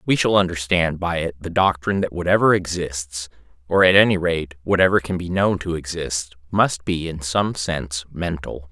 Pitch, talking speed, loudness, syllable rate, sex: 85 Hz, 180 wpm, -20 LUFS, 5.0 syllables/s, male